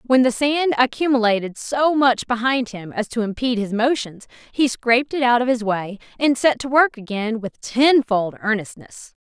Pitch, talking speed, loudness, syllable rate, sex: 240 Hz, 180 wpm, -19 LUFS, 4.8 syllables/s, female